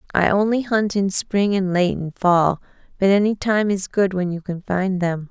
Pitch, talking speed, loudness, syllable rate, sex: 190 Hz, 215 wpm, -20 LUFS, 4.5 syllables/s, female